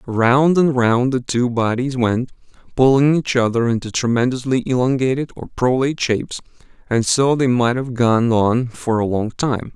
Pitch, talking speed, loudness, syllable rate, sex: 125 Hz, 165 wpm, -17 LUFS, 4.7 syllables/s, male